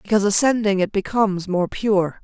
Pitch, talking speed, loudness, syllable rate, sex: 200 Hz, 160 wpm, -19 LUFS, 5.5 syllables/s, female